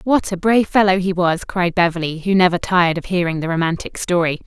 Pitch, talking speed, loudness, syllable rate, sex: 180 Hz, 215 wpm, -17 LUFS, 6.0 syllables/s, female